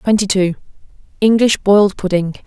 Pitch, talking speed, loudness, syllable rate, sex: 200 Hz, 95 wpm, -14 LUFS, 5.3 syllables/s, female